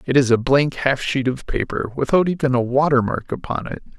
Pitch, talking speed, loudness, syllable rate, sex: 135 Hz, 225 wpm, -19 LUFS, 5.4 syllables/s, male